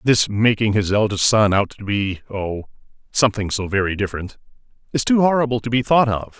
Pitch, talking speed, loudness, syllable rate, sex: 110 Hz, 170 wpm, -19 LUFS, 5.5 syllables/s, male